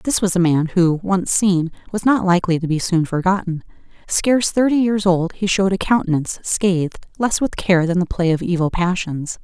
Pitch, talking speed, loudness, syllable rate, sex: 180 Hz, 205 wpm, -18 LUFS, 5.3 syllables/s, female